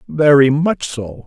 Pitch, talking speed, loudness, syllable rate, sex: 135 Hz, 140 wpm, -14 LUFS, 3.6 syllables/s, male